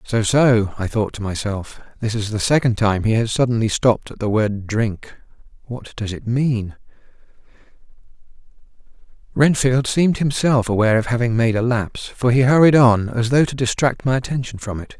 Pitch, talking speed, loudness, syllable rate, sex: 120 Hz, 175 wpm, -18 LUFS, 5.2 syllables/s, male